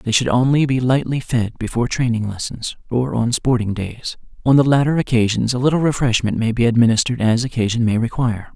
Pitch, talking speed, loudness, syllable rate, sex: 120 Hz, 190 wpm, -18 LUFS, 6.0 syllables/s, male